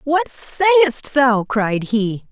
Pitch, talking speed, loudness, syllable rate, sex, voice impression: 260 Hz, 130 wpm, -17 LUFS, 2.6 syllables/s, female, very feminine, very adult-like, very middle-aged, slightly thin, very relaxed, weak, bright, very soft, slightly muffled, fluent, slightly raspy, cute, very intellectual, refreshing, very sincere, calm, very friendly, very reassuring, very unique, very elegant, slightly wild, very sweet, slightly lively, very kind, slightly intense, very modest, light